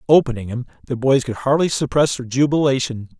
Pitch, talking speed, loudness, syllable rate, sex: 130 Hz, 170 wpm, -19 LUFS, 5.8 syllables/s, male